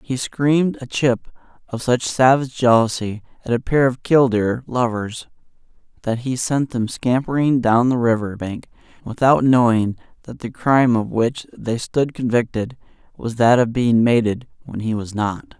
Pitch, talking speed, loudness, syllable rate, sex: 120 Hz, 160 wpm, -19 LUFS, 4.5 syllables/s, male